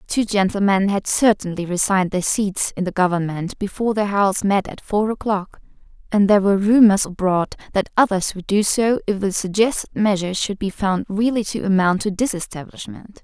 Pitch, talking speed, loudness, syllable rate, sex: 200 Hz, 175 wpm, -19 LUFS, 5.5 syllables/s, female